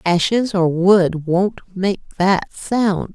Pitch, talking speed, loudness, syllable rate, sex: 190 Hz, 135 wpm, -17 LUFS, 3.0 syllables/s, female